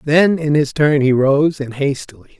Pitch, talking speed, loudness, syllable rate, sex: 145 Hz, 200 wpm, -15 LUFS, 4.6 syllables/s, male